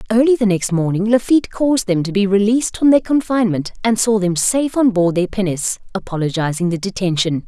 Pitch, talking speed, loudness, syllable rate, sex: 205 Hz, 195 wpm, -17 LUFS, 6.1 syllables/s, female